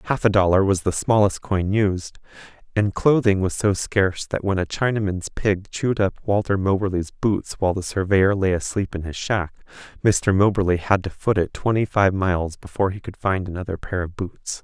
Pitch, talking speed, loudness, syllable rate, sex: 95 Hz, 195 wpm, -21 LUFS, 5.2 syllables/s, male